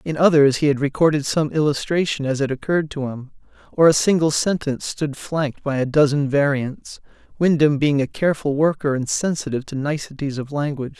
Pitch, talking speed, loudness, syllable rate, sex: 145 Hz, 175 wpm, -20 LUFS, 5.7 syllables/s, male